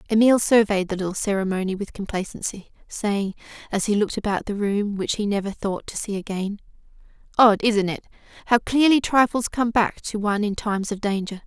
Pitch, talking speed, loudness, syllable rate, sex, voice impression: 210 Hz, 185 wpm, -22 LUFS, 5.5 syllables/s, female, very feminine, slightly adult-like, slightly soft, slightly fluent, slightly cute, calm, slightly elegant, slightly kind